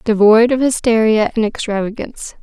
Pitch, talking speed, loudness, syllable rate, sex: 225 Hz, 125 wpm, -14 LUFS, 5.3 syllables/s, female